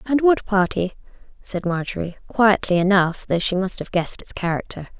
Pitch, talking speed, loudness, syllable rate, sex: 195 Hz, 170 wpm, -21 LUFS, 5.2 syllables/s, female